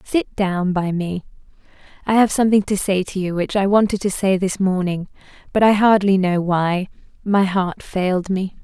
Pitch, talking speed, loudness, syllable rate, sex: 190 Hz, 190 wpm, -19 LUFS, 4.8 syllables/s, female